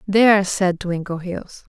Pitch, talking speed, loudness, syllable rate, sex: 190 Hz, 100 wpm, -19 LUFS, 3.9 syllables/s, female